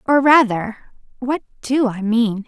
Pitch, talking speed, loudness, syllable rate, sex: 240 Hz, 145 wpm, -17 LUFS, 3.7 syllables/s, female